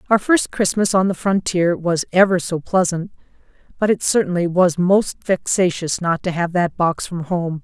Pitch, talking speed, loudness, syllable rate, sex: 180 Hz, 180 wpm, -18 LUFS, 4.7 syllables/s, female